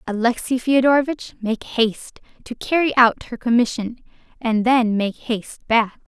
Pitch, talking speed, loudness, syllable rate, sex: 235 Hz, 135 wpm, -19 LUFS, 4.6 syllables/s, female